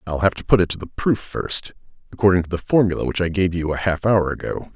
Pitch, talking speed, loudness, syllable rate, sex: 90 Hz, 265 wpm, -20 LUFS, 6.1 syllables/s, male